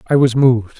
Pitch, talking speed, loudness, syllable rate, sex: 125 Hz, 225 wpm, -14 LUFS, 6.0 syllables/s, male